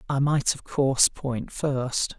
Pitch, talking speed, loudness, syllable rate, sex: 135 Hz, 165 wpm, -24 LUFS, 3.5 syllables/s, male